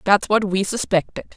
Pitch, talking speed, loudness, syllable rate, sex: 200 Hz, 175 wpm, -19 LUFS, 4.9 syllables/s, female